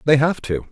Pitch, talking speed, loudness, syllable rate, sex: 140 Hz, 250 wpm, -19 LUFS, 5.6 syllables/s, male